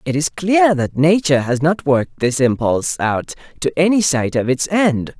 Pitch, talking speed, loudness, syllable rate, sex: 150 Hz, 195 wpm, -16 LUFS, 4.9 syllables/s, male